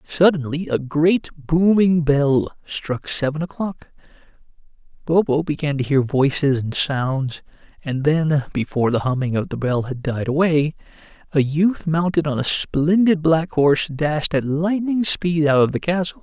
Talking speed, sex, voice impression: 175 wpm, male, masculine, adult-like, tensed, powerful, bright, clear, fluent, intellectual, friendly, wild, lively, kind, light